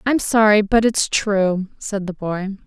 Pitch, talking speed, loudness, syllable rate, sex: 205 Hz, 180 wpm, -18 LUFS, 3.9 syllables/s, female